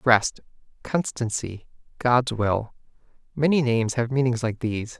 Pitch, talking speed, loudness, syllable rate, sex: 120 Hz, 120 wpm, -24 LUFS, 4.5 syllables/s, male